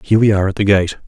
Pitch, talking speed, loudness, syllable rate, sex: 100 Hz, 335 wpm, -14 LUFS, 9.0 syllables/s, male